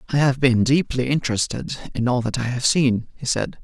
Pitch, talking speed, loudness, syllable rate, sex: 125 Hz, 215 wpm, -21 LUFS, 5.3 syllables/s, male